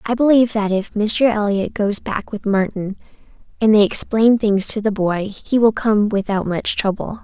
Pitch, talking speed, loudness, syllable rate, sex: 210 Hz, 190 wpm, -17 LUFS, 4.7 syllables/s, female